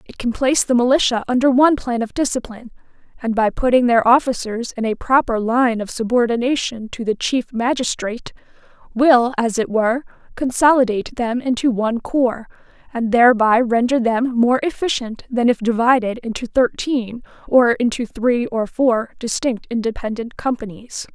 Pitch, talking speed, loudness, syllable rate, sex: 240 Hz, 150 wpm, -18 LUFS, 5.1 syllables/s, female